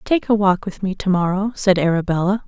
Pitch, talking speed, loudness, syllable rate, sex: 190 Hz, 220 wpm, -18 LUFS, 5.6 syllables/s, female